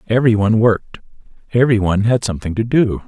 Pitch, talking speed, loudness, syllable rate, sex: 110 Hz, 135 wpm, -16 LUFS, 6.7 syllables/s, male